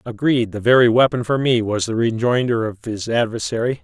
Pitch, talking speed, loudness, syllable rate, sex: 115 Hz, 190 wpm, -18 LUFS, 5.5 syllables/s, male